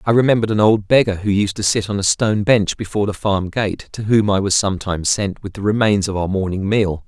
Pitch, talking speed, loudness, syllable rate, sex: 100 Hz, 255 wpm, -17 LUFS, 6.1 syllables/s, male